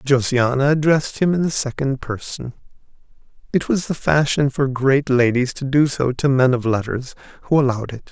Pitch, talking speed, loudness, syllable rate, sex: 135 Hz, 175 wpm, -19 LUFS, 5.2 syllables/s, male